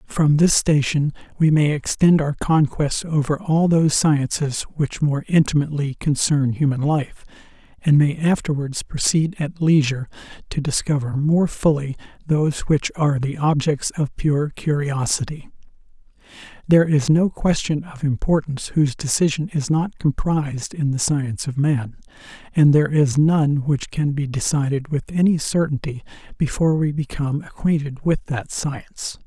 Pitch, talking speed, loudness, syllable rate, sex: 145 Hz, 145 wpm, -20 LUFS, 4.8 syllables/s, male